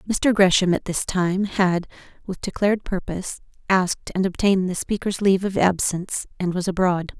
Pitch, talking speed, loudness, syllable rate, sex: 185 Hz, 165 wpm, -22 LUFS, 5.4 syllables/s, female